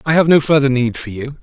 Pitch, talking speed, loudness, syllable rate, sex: 135 Hz, 295 wpm, -14 LUFS, 6.1 syllables/s, male